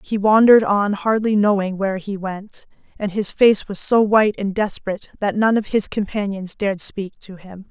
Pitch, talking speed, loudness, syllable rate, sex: 200 Hz, 195 wpm, -18 LUFS, 5.2 syllables/s, female